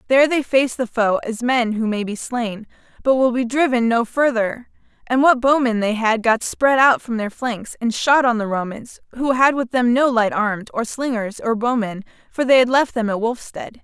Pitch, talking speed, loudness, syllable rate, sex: 240 Hz, 225 wpm, -18 LUFS, 4.9 syllables/s, female